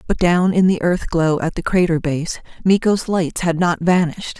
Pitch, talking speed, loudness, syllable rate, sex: 175 Hz, 205 wpm, -18 LUFS, 4.8 syllables/s, female